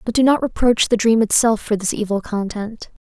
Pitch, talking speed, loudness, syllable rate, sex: 220 Hz, 215 wpm, -18 LUFS, 5.3 syllables/s, female